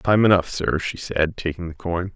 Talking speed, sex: 225 wpm, male